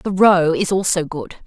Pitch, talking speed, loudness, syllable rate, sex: 175 Hz, 205 wpm, -16 LUFS, 4.4 syllables/s, female